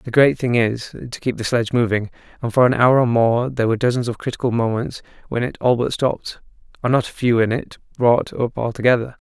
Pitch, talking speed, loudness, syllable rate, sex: 120 Hz, 225 wpm, -19 LUFS, 6.0 syllables/s, male